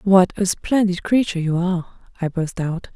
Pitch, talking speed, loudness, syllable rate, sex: 185 Hz, 185 wpm, -20 LUFS, 5.0 syllables/s, female